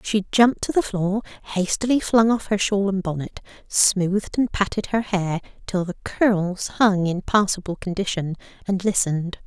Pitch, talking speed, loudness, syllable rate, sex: 195 Hz, 165 wpm, -22 LUFS, 4.7 syllables/s, female